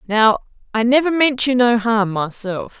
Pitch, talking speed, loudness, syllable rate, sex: 235 Hz, 170 wpm, -17 LUFS, 4.4 syllables/s, female